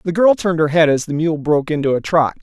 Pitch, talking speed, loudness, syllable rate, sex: 160 Hz, 295 wpm, -16 LUFS, 6.7 syllables/s, male